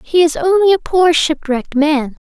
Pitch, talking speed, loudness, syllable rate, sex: 320 Hz, 185 wpm, -14 LUFS, 4.8 syllables/s, female